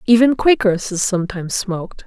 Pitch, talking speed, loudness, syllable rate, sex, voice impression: 210 Hz, 115 wpm, -17 LUFS, 6.3 syllables/s, female, feminine, middle-aged, slightly thick, slightly relaxed, slightly bright, soft, intellectual, calm, friendly, reassuring, elegant, kind, modest